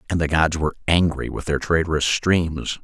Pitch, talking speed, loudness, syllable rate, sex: 80 Hz, 190 wpm, -21 LUFS, 5.3 syllables/s, male